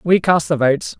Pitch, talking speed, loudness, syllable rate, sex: 160 Hz, 240 wpm, -16 LUFS, 5.3 syllables/s, male